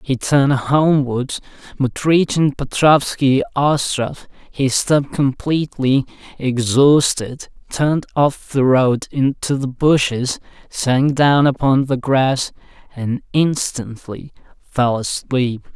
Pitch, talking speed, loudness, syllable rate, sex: 135 Hz, 105 wpm, -17 LUFS, 3.5 syllables/s, male